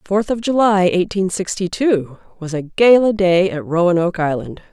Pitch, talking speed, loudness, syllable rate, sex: 185 Hz, 180 wpm, -16 LUFS, 4.9 syllables/s, female